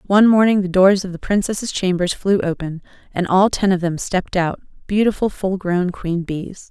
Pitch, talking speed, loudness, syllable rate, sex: 185 Hz, 195 wpm, -18 LUFS, 5.2 syllables/s, female